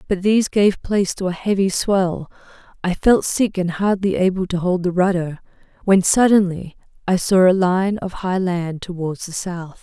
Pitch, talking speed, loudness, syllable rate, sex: 185 Hz, 185 wpm, -19 LUFS, 4.6 syllables/s, female